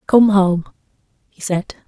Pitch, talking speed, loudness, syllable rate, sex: 195 Hz, 130 wpm, -16 LUFS, 3.6 syllables/s, female